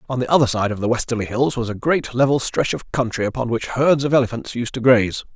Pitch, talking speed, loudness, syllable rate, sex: 120 Hz, 260 wpm, -19 LUFS, 6.3 syllables/s, male